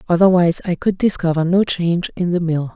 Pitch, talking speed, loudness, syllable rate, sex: 175 Hz, 195 wpm, -17 LUFS, 6.0 syllables/s, female